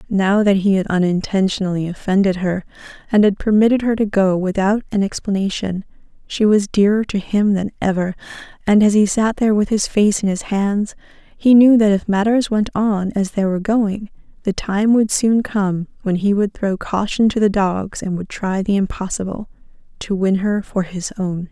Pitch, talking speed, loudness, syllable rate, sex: 200 Hz, 190 wpm, -17 LUFS, 5.0 syllables/s, female